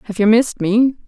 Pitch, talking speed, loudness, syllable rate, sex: 225 Hz, 225 wpm, -15 LUFS, 6.2 syllables/s, female